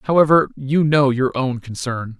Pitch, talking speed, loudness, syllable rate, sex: 135 Hz, 165 wpm, -18 LUFS, 4.3 syllables/s, male